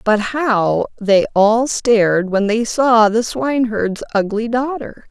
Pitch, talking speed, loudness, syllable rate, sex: 225 Hz, 140 wpm, -16 LUFS, 3.7 syllables/s, female